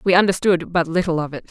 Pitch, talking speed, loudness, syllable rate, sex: 170 Hz, 240 wpm, -19 LUFS, 6.5 syllables/s, female